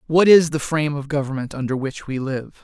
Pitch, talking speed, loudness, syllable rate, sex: 145 Hz, 230 wpm, -20 LUFS, 5.7 syllables/s, male